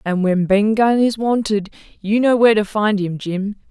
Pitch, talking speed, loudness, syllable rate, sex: 210 Hz, 210 wpm, -17 LUFS, 4.7 syllables/s, female